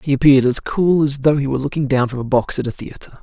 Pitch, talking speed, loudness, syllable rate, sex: 140 Hz, 295 wpm, -17 LUFS, 6.7 syllables/s, male